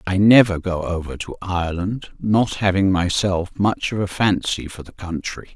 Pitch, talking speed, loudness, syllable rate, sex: 95 Hz, 175 wpm, -20 LUFS, 4.6 syllables/s, male